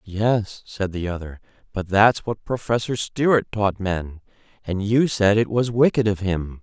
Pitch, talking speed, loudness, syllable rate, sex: 105 Hz, 170 wpm, -21 LUFS, 4.2 syllables/s, male